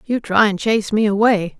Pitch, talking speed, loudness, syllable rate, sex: 210 Hz, 225 wpm, -16 LUFS, 5.4 syllables/s, female